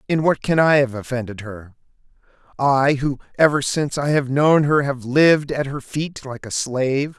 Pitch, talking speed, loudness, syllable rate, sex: 135 Hz, 185 wpm, -19 LUFS, 4.9 syllables/s, male